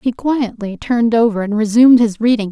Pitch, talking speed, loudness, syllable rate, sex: 230 Hz, 190 wpm, -14 LUFS, 5.7 syllables/s, female